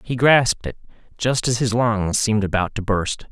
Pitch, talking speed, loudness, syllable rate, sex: 110 Hz, 200 wpm, -19 LUFS, 5.0 syllables/s, male